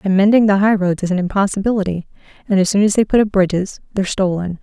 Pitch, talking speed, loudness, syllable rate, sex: 195 Hz, 220 wpm, -16 LUFS, 6.8 syllables/s, female